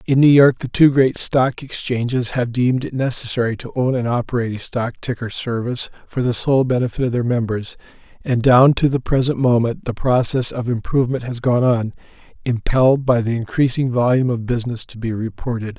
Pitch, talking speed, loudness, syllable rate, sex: 125 Hz, 190 wpm, -18 LUFS, 5.6 syllables/s, male